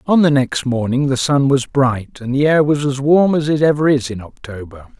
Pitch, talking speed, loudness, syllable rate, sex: 135 Hz, 240 wpm, -15 LUFS, 5.0 syllables/s, male